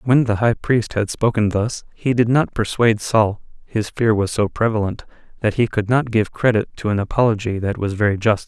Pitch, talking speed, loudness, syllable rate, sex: 110 Hz, 210 wpm, -19 LUFS, 5.2 syllables/s, male